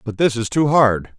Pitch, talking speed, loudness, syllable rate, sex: 120 Hz, 255 wpm, -17 LUFS, 4.6 syllables/s, male